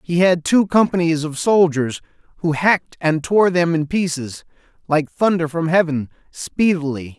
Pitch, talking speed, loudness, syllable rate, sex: 165 Hz, 150 wpm, -18 LUFS, 4.4 syllables/s, male